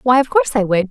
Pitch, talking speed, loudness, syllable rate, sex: 215 Hz, 330 wpm, -15 LUFS, 7.4 syllables/s, female